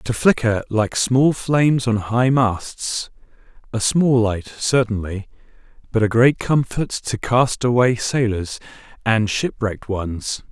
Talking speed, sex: 135 wpm, male